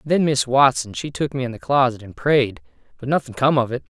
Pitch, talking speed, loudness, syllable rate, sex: 130 Hz, 245 wpm, -20 LUFS, 5.6 syllables/s, male